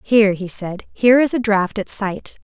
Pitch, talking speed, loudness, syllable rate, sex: 210 Hz, 220 wpm, -17 LUFS, 5.0 syllables/s, female